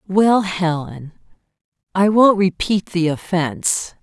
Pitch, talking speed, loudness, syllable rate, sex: 185 Hz, 105 wpm, -17 LUFS, 3.7 syllables/s, female